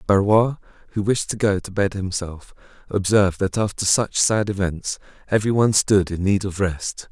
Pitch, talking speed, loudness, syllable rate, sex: 100 Hz, 175 wpm, -20 LUFS, 5.1 syllables/s, male